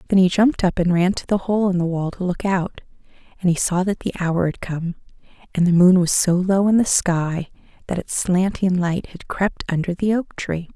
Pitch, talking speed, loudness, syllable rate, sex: 185 Hz, 235 wpm, -20 LUFS, 5.1 syllables/s, female